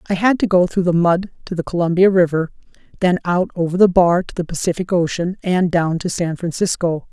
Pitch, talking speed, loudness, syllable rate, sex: 175 Hz, 210 wpm, -17 LUFS, 5.6 syllables/s, female